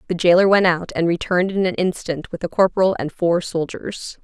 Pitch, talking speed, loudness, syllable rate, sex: 180 Hz, 215 wpm, -19 LUFS, 5.5 syllables/s, female